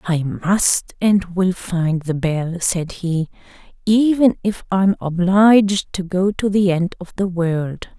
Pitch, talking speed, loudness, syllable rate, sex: 185 Hz, 165 wpm, -18 LUFS, 3.6 syllables/s, female